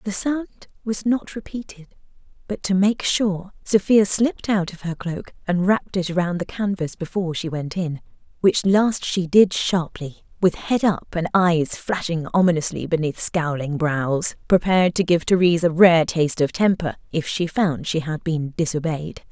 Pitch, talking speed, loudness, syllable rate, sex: 180 Hz, 170 wpm, -21 LUFS, 4.6 syllables/s, female